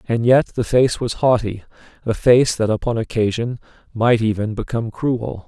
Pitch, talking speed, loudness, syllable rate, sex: 115 Hz, 165 wpm, -18 LUFS, 4.8 syllables/s, male